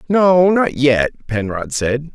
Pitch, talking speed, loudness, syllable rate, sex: 145 Hz, 140 wpm, -16 LUFS, 3.3 syllables/s, male